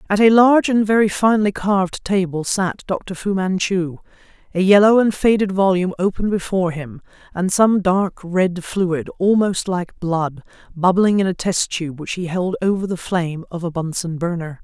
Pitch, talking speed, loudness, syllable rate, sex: 185 Hz, 175 wpm, -18 LUFS, 4.9 syllables/s, female